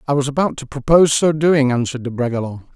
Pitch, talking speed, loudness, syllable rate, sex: 135 Hz, 220 wpm, -17 LUFS, 7.2 syllables/s, male